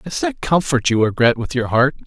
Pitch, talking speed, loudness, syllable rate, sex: 135 Hz, 230 wpm, -17 LUFS, 5.4 syllables/s, male